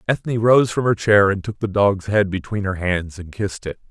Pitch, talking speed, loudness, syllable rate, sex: 100 Hz, 245 wpm, -19 LUFS, 5.2 syllables/s, male